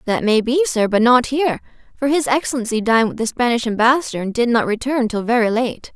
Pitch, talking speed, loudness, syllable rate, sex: 235 Hz, 220 wpm, -17 LUFS, 6.1 syllables/s, female